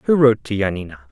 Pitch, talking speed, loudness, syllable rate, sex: 110 Hz, 215 wpm, -18 LUFS, 7.5 syllables/s, male